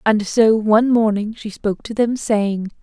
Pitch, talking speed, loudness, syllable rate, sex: 215 Hz, 190 wpm, -17 LUFS, 4.5 syllables/s, female